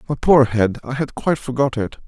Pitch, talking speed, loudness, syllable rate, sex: 130 Hz, 230 wpm, -18 LUFS, 5.9 syllables/s, male